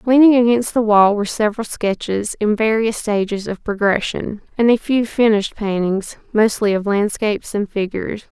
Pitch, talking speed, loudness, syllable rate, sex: 215 Hz, 150 wpm, -17 LUFS, 5.1 syllables/s, female